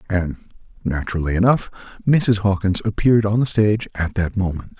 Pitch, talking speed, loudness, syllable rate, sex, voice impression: 100 Hz, 150 wpm, -20 LUFS, 5.7 syllables/s, male, very masculine, very adult-like, very old, very thick, relaxed, very powerful, weak, dark, soft, very muffled, fluent, very raspy, very cool, intellectual, sincere, very calm, very mature, very friendly, very reassuring, very unique, elegant, very wild, very sweet, very kind, modest